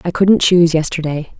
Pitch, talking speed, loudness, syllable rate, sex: 165 Hz, 175 wpm, -14 LUFS, 5.4 syllables/s, female